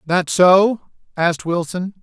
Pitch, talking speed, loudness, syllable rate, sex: 180 Hz, 120 wpm, -16 LUFS, 4.0 syllables/s, male